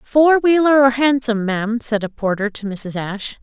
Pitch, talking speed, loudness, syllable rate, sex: 240 Hz, 190 wpm, -17 LUFS, 4.9 syllables/s, female